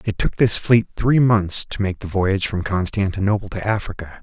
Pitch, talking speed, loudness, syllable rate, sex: 100 Hz, 200 wpm, -19 LUFS, 5.1 syllables/s, male